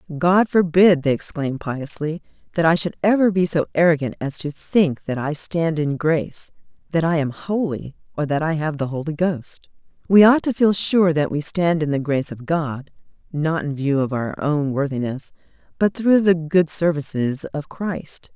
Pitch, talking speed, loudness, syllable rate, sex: 160 Hz, 190 wpm, -20 LUFS, 4.7 syllables/s, female